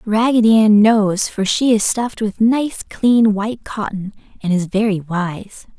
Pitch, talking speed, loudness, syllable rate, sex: 210 Hz, 165 wpm, -16 LUFS, 4.2 syllables/s, female